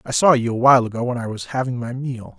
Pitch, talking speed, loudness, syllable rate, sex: 125 Hz, 300 wpm, -19 LUFS, 6.6 syllables/s, male